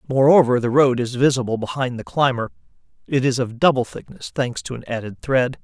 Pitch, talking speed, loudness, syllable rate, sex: 130 Hz, 190 wpm, -20 LUFS, 5.6 syllables/s, male